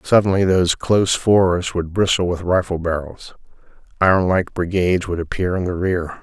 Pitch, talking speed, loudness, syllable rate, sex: 90 Hz, 155 wpm, -18 LUFS, 5.6 syllables/s, male